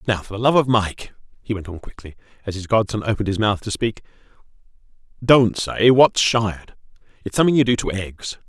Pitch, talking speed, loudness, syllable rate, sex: 110 Hz, 200 wpm, -19 LUFS, 5.8 syllables/s, male